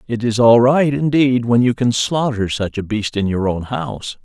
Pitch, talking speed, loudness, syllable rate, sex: 120 Hz, 225 wpm, -16 LUFS, 4.7 syllables/s, male